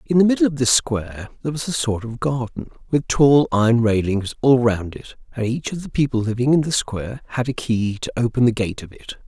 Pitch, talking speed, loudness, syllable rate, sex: 125 Hz, 240 wpm, -20 LUFS, 5.7 syllables/s, male